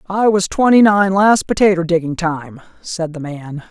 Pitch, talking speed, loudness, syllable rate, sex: 180 Hz, 180 wpm, -14 LUFS, 4.5 syllables/s, female